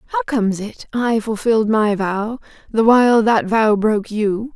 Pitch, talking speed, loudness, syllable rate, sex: 220 Hz, 170 wpm, -17 LUFS, 4.6 syllables/s, female